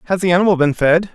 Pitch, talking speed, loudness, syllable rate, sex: 175 Hz, 260 wpm, -15 LUFS, 7.6 syllables/s, male